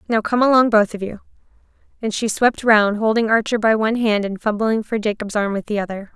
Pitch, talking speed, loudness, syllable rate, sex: 215 Hz, 225 wpm, -18 LUFS, 5.8 syllables/s, female